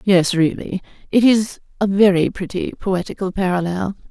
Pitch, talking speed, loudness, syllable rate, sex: 190 Hz, 130 wpm, -18 LUFS, 4.8 syllables/s, female